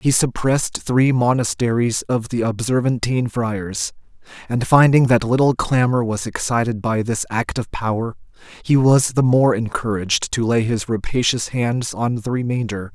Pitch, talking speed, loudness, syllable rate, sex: 120 Hz, 155 wpm, -19 LUFS, 4.6 syllables/s, male